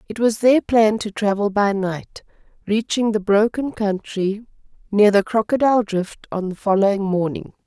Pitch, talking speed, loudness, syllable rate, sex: 210 Hz, 155 wpm, -19 LUFS, 4.6 syllables/s, female